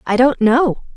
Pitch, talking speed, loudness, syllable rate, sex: 250 Hz, 190 wpm, -15 LUFS, 4.2 syllables/s, female